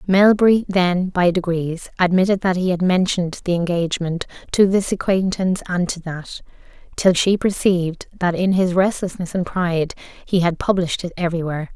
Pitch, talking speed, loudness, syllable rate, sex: 180 Hz, 160 wpm, -19 LUFS, 5.3 syllables/s, female